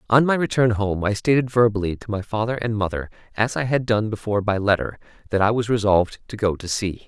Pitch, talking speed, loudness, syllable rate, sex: 110 Hz, 230 wpm, -21 LUFS, 6.1 syllables/s, male